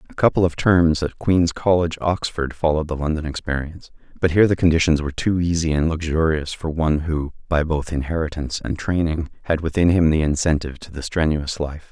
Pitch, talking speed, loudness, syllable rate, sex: 80 Hz, 190 wpm, -20 LUFS, 6.0 syllables/s, male